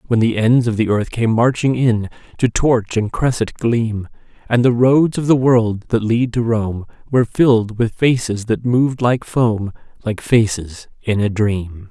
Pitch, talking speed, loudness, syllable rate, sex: 115 Hz, 185 wpm, -17 LUFS, 4.2 syllables/s, male